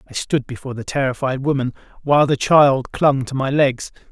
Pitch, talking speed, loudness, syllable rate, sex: 135 Hz, 190 wpm, -18 LUFS, 5.4 syllables/s, male